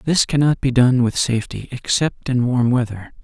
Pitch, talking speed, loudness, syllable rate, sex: 125 Hz, 185 wpm, -18 LUFS, 4.9 syllables/s, male